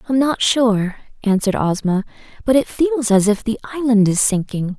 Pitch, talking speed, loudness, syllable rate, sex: 225 Hz, 175 wpm, -17 LUFS, 5.1 syllables/s, female